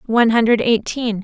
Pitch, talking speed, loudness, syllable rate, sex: 225 Hz, 145 wpm, -16 LUFS, 5.5 syllables/s, female